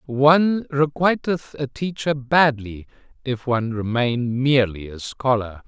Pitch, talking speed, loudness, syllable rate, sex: 130 Hz, 115 wpm, -21 LUFS, 4.1 syllables/s, male